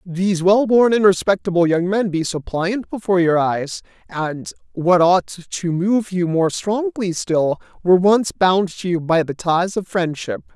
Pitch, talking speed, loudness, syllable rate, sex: 185 Hz, 175 wpm, -18 LUFS, 4.3 syllables/s, male